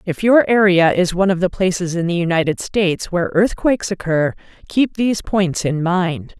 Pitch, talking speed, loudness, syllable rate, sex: 185 Hz, 190 wpm, -17 LUFS, 5.3 syllables/s, female